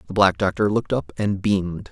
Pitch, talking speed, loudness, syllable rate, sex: 100 Hz, 220 wpm, -21 LUFS, 6.0 syllables/s, male